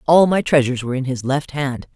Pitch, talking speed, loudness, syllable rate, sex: 140 Hz, 245 wpm, -18 LUFS, 6.2 syllables/s, female